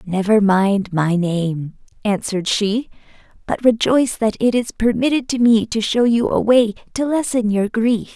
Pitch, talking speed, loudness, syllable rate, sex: 220 Hz, 170 wpm, -17 LUFS, 4.5 syllables/s, female